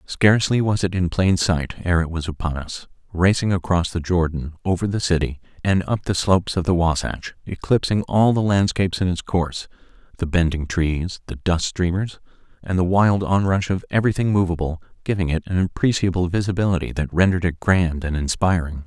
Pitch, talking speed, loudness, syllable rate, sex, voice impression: 90 Hz, 175 wpm, -21 LUFS, 5.5 syllables/s, male, very masculine, very adult-like, very middle-aged, very thick, slightly relaxed, slightly powerful, dark, soft, clear, muffled, fluent, very cool, very intellectual, refreshing, sincere, calm, very mature, friendly, reassuring, unique, very elegant, wild, sweet, kind, modest